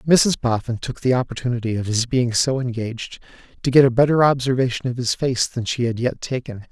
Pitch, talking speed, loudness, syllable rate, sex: 125 Hz, 205 wpm, -20 LUFS, 5.7 syllables/s, male